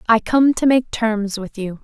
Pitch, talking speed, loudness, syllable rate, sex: 225 Hz, 230 wpm, -18 LUFS, 4.2 syllables/s, female